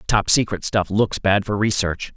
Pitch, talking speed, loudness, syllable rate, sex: 100 Hz, 195 wpm, -19 LUFS, 5.1 syllables/s, male